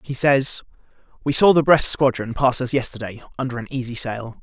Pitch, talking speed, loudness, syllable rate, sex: 130 Hz, 175 wpm, -20 LUFS, 5.5 syllables/s, male